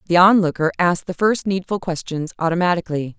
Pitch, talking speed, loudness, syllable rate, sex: 175 Hz, 150 wpm, -19 LUFS, 6.3 syllables/s, female